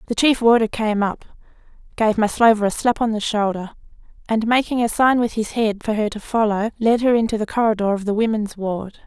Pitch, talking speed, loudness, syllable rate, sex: 220 Hz, 210 wpm, -19 LUFS, 5.6 syllables/s, female